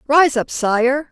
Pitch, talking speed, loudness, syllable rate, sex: 265 Hz, 160 wpm, -16 LUFS, 3.1 syllables/s, female